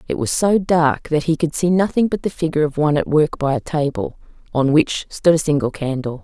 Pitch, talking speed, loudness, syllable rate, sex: 155 Hz, 240 wpm, -18 LUFS, 5.6 syllables/s, female